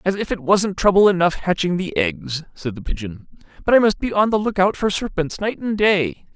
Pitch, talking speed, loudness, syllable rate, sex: 180 Hz, 235 wpm, -19 LUFS, 5.2 syllables/s, male